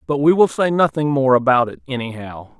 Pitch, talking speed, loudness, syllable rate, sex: 135 Hz, 210 wpm, -17 LUFS, 5.6 syllables/s, male